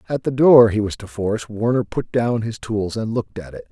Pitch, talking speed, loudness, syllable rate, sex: 110 Hz, 260 wpm, -19 LUFS, 5.4 syllables/s, male